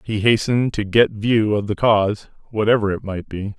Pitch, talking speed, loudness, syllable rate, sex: 105 Hz, 200 wpm, -19 LUFS, 5.2 syllables/s, male